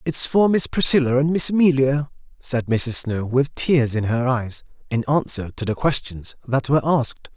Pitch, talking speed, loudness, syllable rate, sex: 130 Hz, 190 wpm, -20 LUFS, 4.8 syllables/s, male